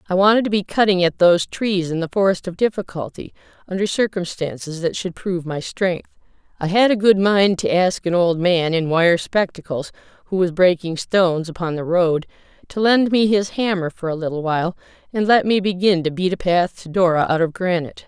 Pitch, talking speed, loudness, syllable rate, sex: 180 Hz, 205 wpm, -19 LUFS, 5.4 syllables/s, female